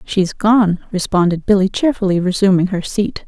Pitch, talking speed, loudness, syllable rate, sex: 190 Hz, 145 wpm, -15 LUFS, 4.9 syllables/s, female